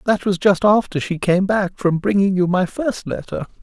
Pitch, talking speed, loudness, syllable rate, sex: 195 Hz, 215 wpm, -18 LUFS, 4.8 syllables/s, male